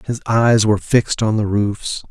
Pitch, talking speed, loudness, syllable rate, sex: 110 Hz, 200 wpm, -17 LUFS, 4.8 syllables/s, male